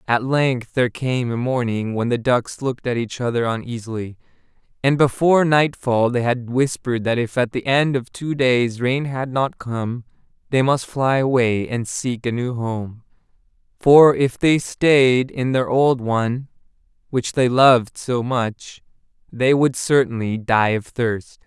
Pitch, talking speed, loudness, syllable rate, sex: 125 Hz, 170 wpm, -19 LUFS, 4.2 syllables/s, male